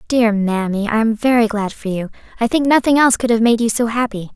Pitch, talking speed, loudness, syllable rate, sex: 225 Hz, 250 wpm, -16 LUFS, 6.0 syllables/s, female